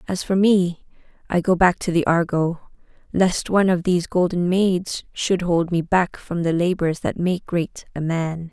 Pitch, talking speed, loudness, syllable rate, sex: 175 Hz, 190 wpm, -21 LUFS, 4.4 syllables/s, female